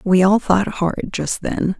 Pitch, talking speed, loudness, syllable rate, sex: 190 Hz, 200 wpm, -18 LUFS, 4.0 syllables/s, female